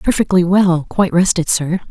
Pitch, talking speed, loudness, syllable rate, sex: 180 Hz, 155 wpm, -14 LUFS, 5.1 syllables/s, female